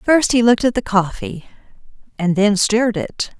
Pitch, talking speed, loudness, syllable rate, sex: 215 Hz, 175 wpm, -16 LUFS, 5.3 syllables/s, female